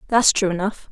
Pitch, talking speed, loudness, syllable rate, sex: 200 Hz, 195 wpm, -19 LUFS, 5.8 syllables/s, female